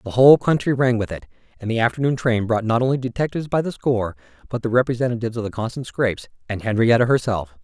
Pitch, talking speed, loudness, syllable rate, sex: 115 Hz, 210 wpm, -20 LUFS, 7.0 syllables/s, male